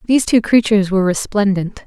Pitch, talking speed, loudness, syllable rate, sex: 205 Hz, 160 wpm, -15 LUFS, 6.4 syllables/s, female